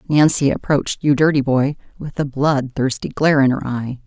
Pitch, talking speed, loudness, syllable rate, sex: 140 Hz, 175 wpm, -18 LUFS, 5.2 syllables/s, female